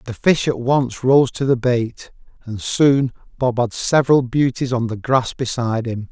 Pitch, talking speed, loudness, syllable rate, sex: 125 Hz, 185 wpm, -18 LUFS, 4.4 syllables/s, male